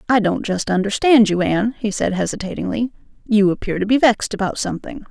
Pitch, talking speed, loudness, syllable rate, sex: 215 Hz, 190 wpm, -18 LUFS, 6.2 syllables/s, female